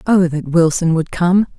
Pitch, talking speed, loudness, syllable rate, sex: 170 Hz, 190 wpm, -15 LUFS, 4.4 syllables/s, female